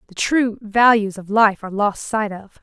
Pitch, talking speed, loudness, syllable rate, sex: 210 Hz, 205 wpm, -18 LUFS, 4.6 syllables/s, female